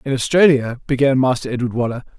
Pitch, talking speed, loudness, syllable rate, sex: 130 Hz, 165 wpm, -17 LUFS, 6.4 syllables/s, male